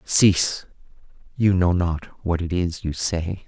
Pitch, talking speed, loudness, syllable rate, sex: 90 Hz, 155 wpm, -22 LUFS, 3.7 syllables/s, male